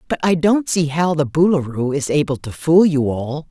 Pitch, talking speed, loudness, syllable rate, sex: 155 Hz, 225 wpm, -17 LUFS, 4.9 syllables/s, female